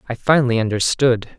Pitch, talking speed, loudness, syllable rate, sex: 120 Hz, 130 wpm, -17 LUFS, 6.3 syllables/s, male